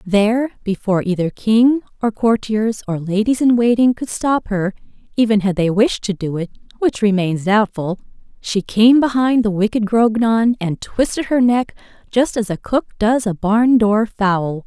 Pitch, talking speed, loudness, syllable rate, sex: 215 Hz, 165 wpm, -17 LUFS, 4.5 syllables/s, female